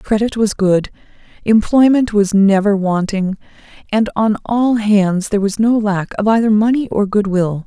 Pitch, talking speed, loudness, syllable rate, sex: 210 Hz, 165 wpm, -15 LUFS, 4.5 syllables/s, female